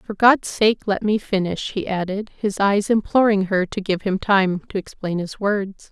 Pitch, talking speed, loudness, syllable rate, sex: 200 Hz, 205 wpm, -20 LUFS, 4.4 syllables/s, female